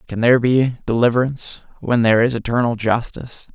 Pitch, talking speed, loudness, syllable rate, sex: 120 Hz, 150 wpm, -17 LUFS, 6.2 syllables/s, male